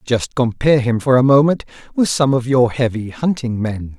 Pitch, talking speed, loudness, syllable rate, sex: 125 Hz, 195 wpm, -16 LUFS, 5.0 syllables/s, male